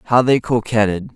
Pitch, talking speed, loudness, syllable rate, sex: 115 Hz, 155 wpm, -17 LUFS, 5.3 syllables/s, male